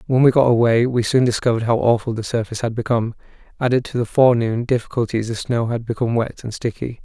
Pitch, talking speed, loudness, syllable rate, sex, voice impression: 120 Hz, 215 wpm, -19 LUFS, 6.7 syllables/s, male, masculine, adult-like, slightly dark, slightly calm, slightly friendly, kind